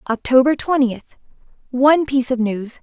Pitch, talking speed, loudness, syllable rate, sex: 260 Hz, 105 wpm, -17 LUFS, 5.2 syllables/s, female